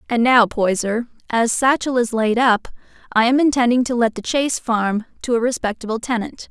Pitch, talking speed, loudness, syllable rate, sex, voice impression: 235 Hz, 185 wpm, -18 LUFS, 5.2 syllables/s, female, very feminine, slightly young, very adult-like, slightly thin, slightly tensed, slightly weak, slightly bright, soft, very clear, fluent, cute, intellectual, very refreshing, sincere, calm, very friendly, very reassuring, unique, very elegant, slightly wild, very sweet, lively, kind, slightly intense, sharp, light